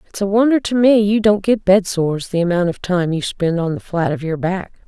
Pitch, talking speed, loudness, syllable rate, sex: 190 Hz, 260 wpm, -17 LUFS, 5.5 syllables/s, female